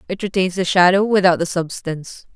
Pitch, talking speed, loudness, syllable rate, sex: 185 Hz, 180 wpm, -17 LUFS, 5.7 syllables/s, female